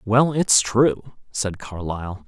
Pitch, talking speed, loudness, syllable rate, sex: 110 Hz, 130 wpm, -21 LUFS, 3.5 syllables/s, male